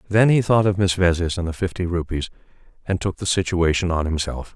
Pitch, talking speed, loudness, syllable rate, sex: 90 Hz, 210 wpm, -21 LUFS, 5.7 syllables/s, male